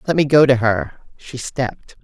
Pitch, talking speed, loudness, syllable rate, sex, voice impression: 130 Hz, 205 wpm, -17 LUFS, 4.8 syllables/s, female, slightly masculine, slightly feminine, very gender-neutral, slightly young, slightly adult-like, slightly thick, tensed, powerful, bright, hard, slightly clear, fluent, slightly raspy, slightly cool, intellectual, refreshing, sincere, slightly calm, slightly friendly, slightly reassuring, very unique, slightly elegant, wild, very lively, kind, intense, slightly sharp